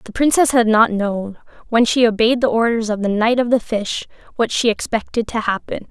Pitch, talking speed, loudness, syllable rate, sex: 225 Hz, 215 wpm, -17 LUFS, 5.2 syllables/s, female